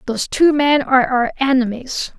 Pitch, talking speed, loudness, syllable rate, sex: 260 Hz, 165 wpm, -16 LUFS, 5.1 syllables/s, female